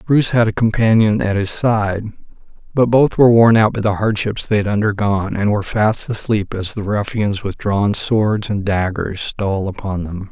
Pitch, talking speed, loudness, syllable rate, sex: 105 Hz, 190 wpm, -17 LUFS, 4.9 syllables/s, male